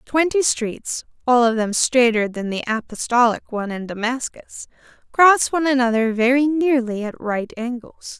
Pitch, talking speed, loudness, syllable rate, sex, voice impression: 245 Hz, 145 wpm, -19 LUFS, 4.6 syllables/s, female, feminine, adult-like, tensed, powerful, clear, raspy, slightly intellectual, slightly unique, elegant, lively, slightly intense, sharp